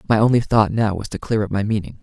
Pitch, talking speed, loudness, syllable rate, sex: 105 Hz, 295 wpm, -19 LUFS, 6.5 syllables/s, male